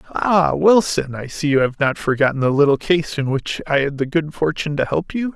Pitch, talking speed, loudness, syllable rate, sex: 150 Hz, 235 wpm, -18 LUFS, 5.4 syllables/s, male